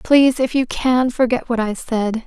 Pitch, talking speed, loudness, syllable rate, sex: 245 Hz, 210 wpm, -18 LUFS, 4.6 syllables/s, female